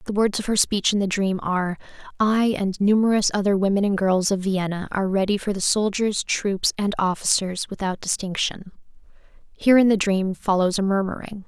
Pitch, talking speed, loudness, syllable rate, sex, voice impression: 200 Hz, 185 wpm, -22 LUFS, 5.3 syllables/s, female, feminine, slightly young, slightly clear, slightly fluent, slightly cute, slightly refreshing, slightly calm, friendly